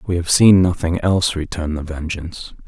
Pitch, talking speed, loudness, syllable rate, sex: 85 Hz, 180 wpm, -17 LUFS, 5.7 syllables/s, male